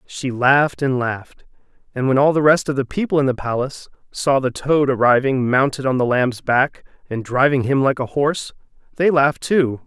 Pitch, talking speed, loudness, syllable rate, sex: 135 Hz, 200 wpm, -18 LUFS, 5.3 syllables/s, male